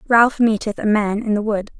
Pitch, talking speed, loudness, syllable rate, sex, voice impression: 215 Hz, 235 wpm, -18 LUFS, 5.0 syllables/s, female, feminine, slightly young, slightly clear, slightly cute, friendly, slightly lively